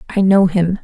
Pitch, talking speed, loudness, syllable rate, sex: 185 Hz, 215 wpm, -14 LUFS, 4.7 syllables/s, female